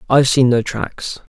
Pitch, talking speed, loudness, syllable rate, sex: 125 Hz, 180 wpm, -16 LUFS, 4.7 syllables/s, male